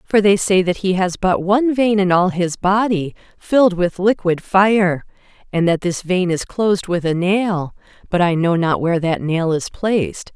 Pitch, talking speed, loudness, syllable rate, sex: 185 Hz, 205 wpm, -17 LUFS, 4.6 syllables/s, female